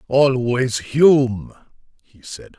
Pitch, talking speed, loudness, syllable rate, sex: 125 Hz, 95 wpm, -17 LUFS, 2.6 syllables/s, male